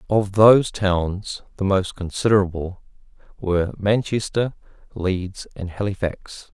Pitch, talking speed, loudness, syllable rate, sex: 95 Hz, 100 wpm, -21 LUFS, 4.1 syllables/s, male